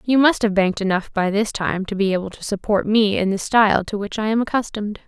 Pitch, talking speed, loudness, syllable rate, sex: 205 Hz, 260 wpm, -20 LUFS, 6.1 syllables/s, female